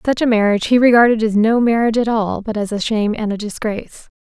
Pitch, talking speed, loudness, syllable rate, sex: 220 Hz, 240 wpm, -16 LUFS, 6.5 syllables/s, female